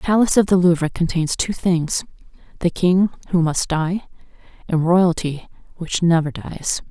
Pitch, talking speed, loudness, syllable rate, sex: 170 Hz, 150 wpm, -19 LUFS, 4.7 syllables/s, female